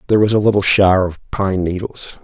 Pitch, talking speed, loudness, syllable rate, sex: 95 Hz, 215 wpm, -15 LUFS, 5.9 syllables/s, male